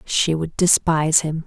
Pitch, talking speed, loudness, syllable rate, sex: 160 Hz, 165 wpm, -18 LUFS, 4.4 syllables/s, female